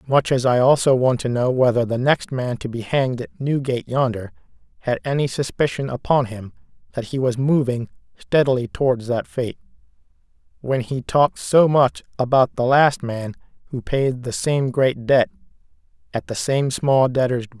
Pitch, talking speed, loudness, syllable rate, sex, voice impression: 130 Hz, 175 wpm, -20 LUFS, 4.9 syllables/s, male, masculine, adult-like, slightly tensed, slightly weak, slightly muffled, cool, intellectual, calm, mature, reassuring, wild, slightly lively, slightly modest